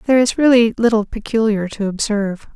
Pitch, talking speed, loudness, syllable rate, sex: 220 Hz, 165 wpm, -16 LUFS, 6.0 syllables/s, female